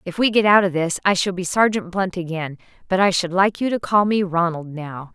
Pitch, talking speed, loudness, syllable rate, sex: 185 Hz, 255 wpm, -19 LUFS, 5.3 syllables/s, female